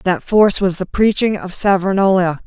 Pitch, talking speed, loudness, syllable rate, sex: 190 Hz, 170 wpm, -15 LUFS, 5.4 syllables/s, female